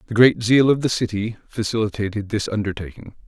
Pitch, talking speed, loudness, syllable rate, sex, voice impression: 110 Hz, 165 wpm, -20 LUFS, 5.9 syllables/s, male, very masculine, very middle-aged, very thick, tensed, very powerful, slightly bright, slightly hard, clear, very muffled, fluent, raspy, very cool, intellectual, slightly refreshing, sincere, calm, mature, friendly, reassuring, very unique, elegant, wild, slightly sweet, lively, kind, slightly modest